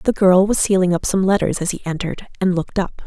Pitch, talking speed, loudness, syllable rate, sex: 185 Hz, 255 wpm, -18 LUFS, 6.5 syllables/s, female